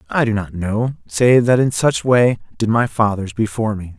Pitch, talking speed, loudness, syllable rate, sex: 110 Hz, 210 wpm, -17 LUFS, 4.9 syllables/s, male